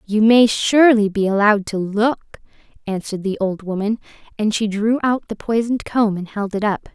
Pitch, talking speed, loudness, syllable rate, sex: 215 Hz, 190 wpm, -18 LUFS, 5.3 syllables/s, female